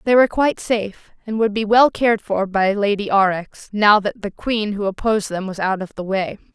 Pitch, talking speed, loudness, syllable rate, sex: 205 Hz, 230 wpm, -19 LUFS, 5.5 syllables/s, female